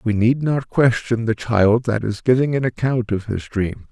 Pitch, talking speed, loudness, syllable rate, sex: 115 Hz, 215 wpm, -19 LUFS, 4.5 syllables/s, male